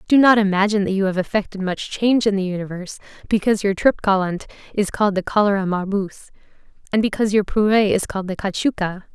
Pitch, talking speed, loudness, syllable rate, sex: 200 Hz, 190 wpm, -19 LUFS, 6.6 syllables/s, female